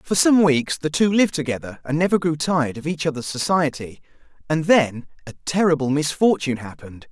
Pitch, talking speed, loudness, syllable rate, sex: 155 Hz, 175 wpm, -20 LUFS, 5.8 syllables/s, male